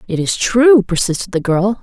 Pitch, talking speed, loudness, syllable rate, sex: 205 Hz, 195 wpm, -14 LUFS, 4.8 syllables/s, female